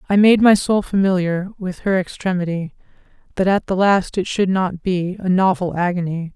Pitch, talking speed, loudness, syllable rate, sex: 185 Hz, 180 wpm, -18 LUFS, 5.0 syllables/s, female